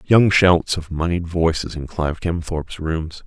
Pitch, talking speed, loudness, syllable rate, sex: 85 Hz, 165 wpm, -20 LUFS, 4.5 syllables/s, male